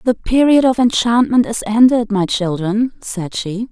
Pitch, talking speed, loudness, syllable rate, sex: 225 Hz, 160 wpm, -15 LUFS, 4.3 syllables/s, female